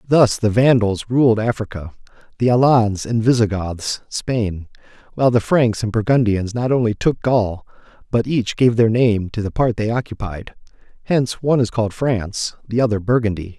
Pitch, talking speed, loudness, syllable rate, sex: 115 Hz, 165 wpm, -18 LUFS, 4.9 syllables/s, male